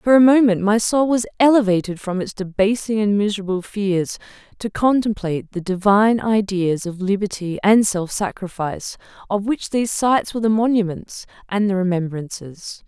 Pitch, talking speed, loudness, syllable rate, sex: 205 Hz, 155 wpm, -19 LUFS, 5.2 syllables/s, female